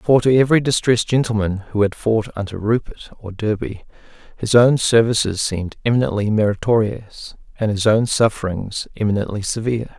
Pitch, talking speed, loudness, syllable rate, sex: 110 Hz, 145 wpm, -18 LUFS, 5.4 syllables/s, male